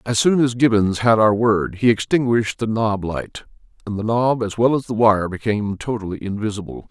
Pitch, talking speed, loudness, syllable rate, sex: 110 Hz, 200 wpm, -19 LUFS, 5.3 syllables/s, male